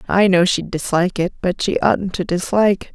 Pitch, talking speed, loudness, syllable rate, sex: 185 Hz, 205 wpm, -18 LUFS, 5.3 syllables/s, female